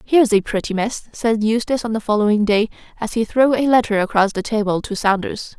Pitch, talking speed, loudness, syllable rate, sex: 220 Hz, 215 wpm, -18 LUFS, 5.8 syllables/s, female